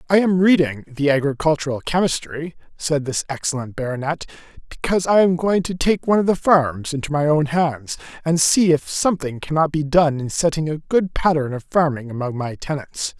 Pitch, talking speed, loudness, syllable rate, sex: 155 Hz, 185 wpm, -20 LUFS, 5.3 syllables/s, male